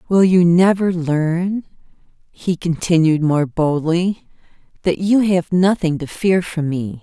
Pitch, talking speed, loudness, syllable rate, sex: 170 Hz, 135 wpm, -17 LUFS, 3.7 syllables/s, female